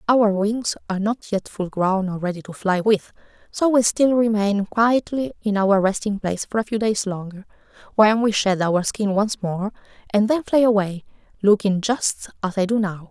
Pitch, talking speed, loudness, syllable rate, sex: 205 Hz, 195 wpm, -21 LUFS, 4.7 syllables/s, female